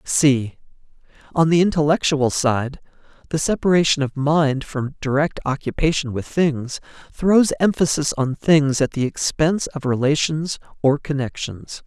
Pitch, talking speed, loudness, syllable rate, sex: 145 Hz, 125 wpm, -20 LUFS, 4.6 syllables/s, male